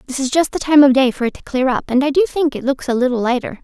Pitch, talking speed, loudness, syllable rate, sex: 270 Hz, 345 wpm, -16 LUFS, 6.9 syllables/s, female